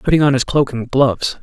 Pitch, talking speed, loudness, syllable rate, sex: 135 Hz, 255 wpm, -16 LUFS, 6.1 syllables/s, male